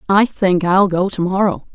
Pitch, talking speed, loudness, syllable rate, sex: 185 Hz, 205 wpm, -16 LUFS, 4.6 syllables/s, female